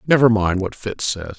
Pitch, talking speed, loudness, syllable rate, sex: 105 Hz, 215 wpm, -19 LUFS, 4.8 syllables/s, male